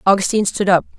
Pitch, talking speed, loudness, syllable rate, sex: 195 Hz, 180 wpm, -16 LUFS, 7.9 syllables/s, female